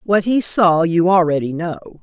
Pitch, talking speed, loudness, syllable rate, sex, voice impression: 175 Hz, 180 wpm, -16 LUFS, 4.7 syllables/s, female, feminine, middle-aged, tensed, powerful, slightly hard, clear, intellectual, calm, elegant, lively, slightly strict, slightly sharp